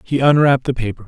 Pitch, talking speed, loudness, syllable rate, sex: 130 Hz, 225 wpm, -16 LUFS, 7.2 syllables/s, male